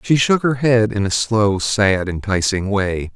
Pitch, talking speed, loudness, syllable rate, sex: 105 Hz, 190 wpm, -17 LUFS, 3.9 syllables/s, male